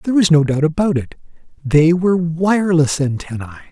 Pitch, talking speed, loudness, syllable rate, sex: 160 Hz, 160 wpm, -16 LUFS, 5.8 syllables/s, male